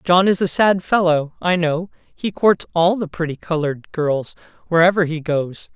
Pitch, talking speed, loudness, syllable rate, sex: 170 Hz, 175 wpm, -18 LUFS, 4.5 syllables/s, female